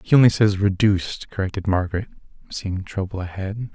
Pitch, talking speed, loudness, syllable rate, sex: 100 Hz, 145 wpm, -22 LUFS, 5.6 syllables/s, male